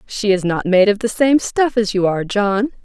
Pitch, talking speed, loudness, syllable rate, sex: 210 Hz, 255 wpm, -16 LUFS, 5.1 syllables/s, female